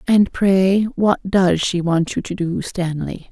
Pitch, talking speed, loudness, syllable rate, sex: 185 Hz, 180 wpm, -18 LUFS, 3.6 syllables/s, female